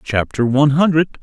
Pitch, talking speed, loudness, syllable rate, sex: 140 Hz, 145 wpm, -15 LUFS, 5.3 syllables/s, male